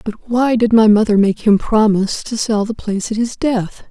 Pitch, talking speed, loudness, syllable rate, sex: 220 Hz, 230 wpm, -15 LUFS, 5.1 syllables/s, female